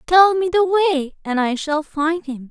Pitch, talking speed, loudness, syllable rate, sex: 320 Hz, 215 wpm, -18 LUFS, 4.9 syllables/s, female